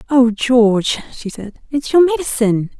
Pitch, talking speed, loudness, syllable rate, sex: 245 Hz, 150 wpm, -15 LUFS, 4.8 syllables/s, female